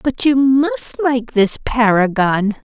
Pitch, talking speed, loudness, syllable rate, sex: 235 Hz, 135 wpm, -15 LUFS, 3.2 syllables/s, female